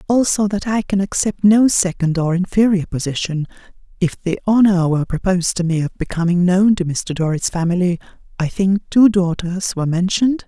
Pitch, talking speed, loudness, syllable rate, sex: 185 Hz, 165 wpm, -17 LUFS, 5.4 syllables/s, female